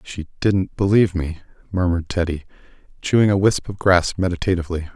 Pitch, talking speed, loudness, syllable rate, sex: 90 Hz, 145 wpm, -20 LUFS, 6.2 syllables/s, male